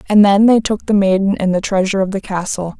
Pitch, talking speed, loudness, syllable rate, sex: 195 Hz, 260 wpm, -14 LUFS, 6.2 syllables/s, female